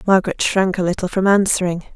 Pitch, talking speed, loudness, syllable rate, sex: 185 Hz, 185 wpm, -17 LUFS, 6.3 syllables/s, female